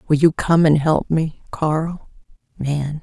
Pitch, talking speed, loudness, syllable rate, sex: 155 Hz, 160 wpm, -19 LUFS, 3.5 syllables/s, female